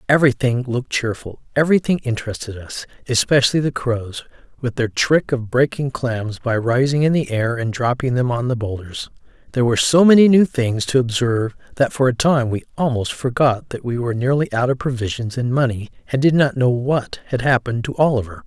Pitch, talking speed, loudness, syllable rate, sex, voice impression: 125 Hz, 190 wpm, -18 LUFS, 5.7 syllables/s, male, very masculine, very adult-like, slightly old, very thick, tensed, powerful, slightly bright, slightly hard, slightly muffled, fluent, slightly raspy, cool, intellectual, slightly refreshing, sincere, very calm, mature, friendly, reassuring, slightly unique, slightly elegant, wild, slightly lively, kind